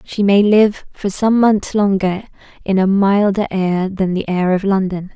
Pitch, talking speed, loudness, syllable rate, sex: 195 Hz, 185 wpm, -15 LUFS, 4.2 syllables/s, female